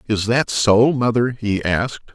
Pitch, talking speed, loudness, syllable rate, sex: 115 Hz, 170 wpm, -18 LUFS, 4.1 syllables/s, male